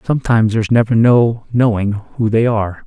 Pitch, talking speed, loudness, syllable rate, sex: 115 Hz, 165 wpm, -14 LUFS, 5.6 syllables/s, male